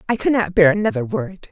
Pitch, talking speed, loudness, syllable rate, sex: 215 Hz, 240 wpm, -18 LUFS, 6.0 syllables/s, female